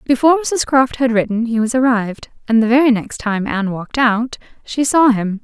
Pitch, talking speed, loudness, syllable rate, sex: 240 Hz, 210 wpm, -16 LUFS, 5.6 syllables/s, female